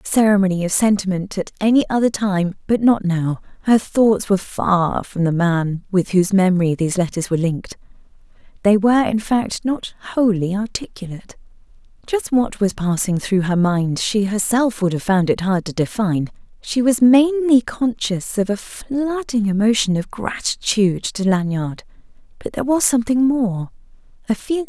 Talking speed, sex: 175 wpm, female